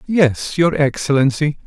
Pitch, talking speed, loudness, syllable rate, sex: 150 Hz, 110 wpm, -16 LUFS, 4.1 syllables/s, male